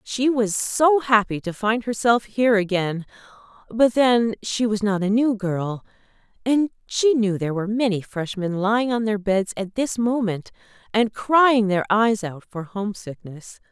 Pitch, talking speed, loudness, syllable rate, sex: 215 Hz, 165 wpm, -21 LUFS, 4.5 syllables/s, female